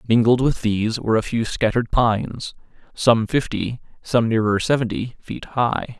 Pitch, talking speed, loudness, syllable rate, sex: 115 Hz, 150 wpm, -20 LUFS, 4.9 syllables/s, male